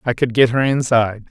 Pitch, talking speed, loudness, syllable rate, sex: 120 Hz, 230 wpm, -16 LUFS, 5.9 syllables/s, male